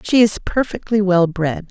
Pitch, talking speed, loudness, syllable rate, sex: 195 Hz, 175 wpm, -17 LUFS, 4.5 syllables/s, female